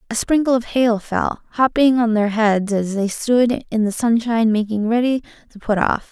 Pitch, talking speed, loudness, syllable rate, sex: 230 Hz, 195 wpm, -18 LUFS, 4.8 syllables/s, female